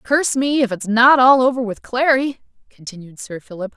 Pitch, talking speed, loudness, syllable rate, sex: 240 Hz, 190 wpm, -16 LUFS, 5.3 syllables/s, female